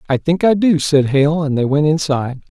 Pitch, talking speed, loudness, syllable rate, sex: 150 Hz, 230 wpm, -15 LUFS, 5.3 syllables/s, male